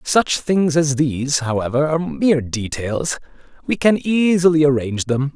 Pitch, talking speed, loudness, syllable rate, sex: 150 Hz, 145 wpm, -18 LUFS, 4.8 syllables/s, male